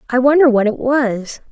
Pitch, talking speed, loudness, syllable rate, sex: 250 Hz, 200 wpm, -14 LUFS, 4.7 syllables/s, female